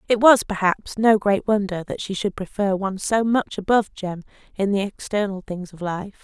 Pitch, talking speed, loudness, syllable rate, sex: 200 Hz, 200 wpm, -22 LUFS, 5.2 syllables/s, female